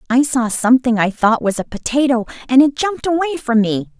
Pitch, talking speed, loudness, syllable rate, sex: 250 Hz, 210 wpm, -16 LUFS, 6.1 syllables/s, female